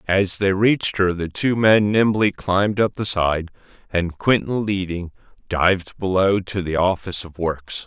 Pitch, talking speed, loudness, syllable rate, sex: 95 Hz, 170 wpm, -20 LUFS, 4.5 syllables/s, male